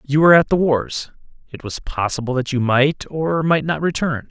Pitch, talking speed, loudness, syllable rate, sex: 145 Hz, 210 wpm, -18 LUFS, 4.9 syllables/s, male